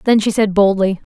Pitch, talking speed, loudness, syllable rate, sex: 205 Hz, 215 wpm, -15 LUFS, 5.6 syllables/s, female